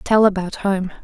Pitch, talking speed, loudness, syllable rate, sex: 195 Hz, 175 wpm, -19 LUFS, 4.4 syllables/s, female